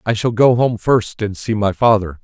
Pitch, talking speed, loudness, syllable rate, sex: 110 Hz, 240 wpm, -16 LUFS, 4.7 syllables/s, male